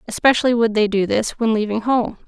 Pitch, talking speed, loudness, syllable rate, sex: 225 Hz, 210 wpm, -18 LUFS, 5.9 syllables/s, female